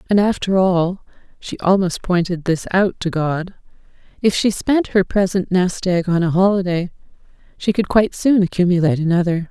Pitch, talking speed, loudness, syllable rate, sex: 185 Hz, 150 wpm, -18 LUFS, 5.1 syllables/s, female